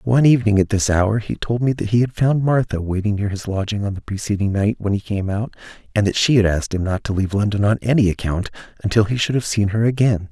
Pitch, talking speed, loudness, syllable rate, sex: 105 Hz, 260 wpm, -19 LUFS, 6.3 syllables/s, male